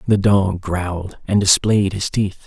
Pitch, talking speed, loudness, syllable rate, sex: 95 Hz, 170 wpm, -18 LUFS, 4.0 syllables/s, male